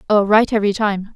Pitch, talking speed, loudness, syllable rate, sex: 205 Hz, 210 wpm, -16 LUFS, 6.3 syllables/s, female